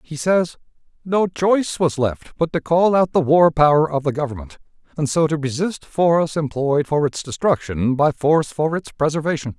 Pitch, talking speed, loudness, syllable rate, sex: 155 Hz, 190 wpm, -19 LUFS, 5.0 syllables/s, male